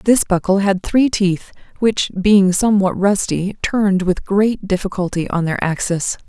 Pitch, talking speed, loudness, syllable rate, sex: 195 Hz, 155 wpm, -17 LUFS, 4.3 syllables/s, female